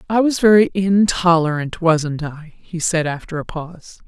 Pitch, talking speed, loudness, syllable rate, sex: 170 Hz, 160 wpm, -17 LUFS, 4.5 syllables/s, female